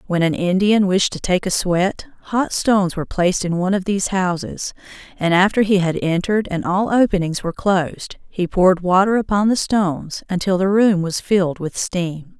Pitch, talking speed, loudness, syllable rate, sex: 190 Hz, 195 wpm, -18 LUFS, 5.3 syllables/s, female